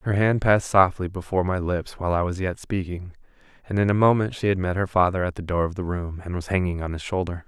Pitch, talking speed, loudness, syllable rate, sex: 90 Hz, 265 wpm, -24 LUFS, 6.3 syllables/s, male